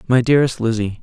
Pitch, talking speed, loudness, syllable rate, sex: 115 Hz, 175 wpm, -17 LUFS, 6.9 syllables/s, male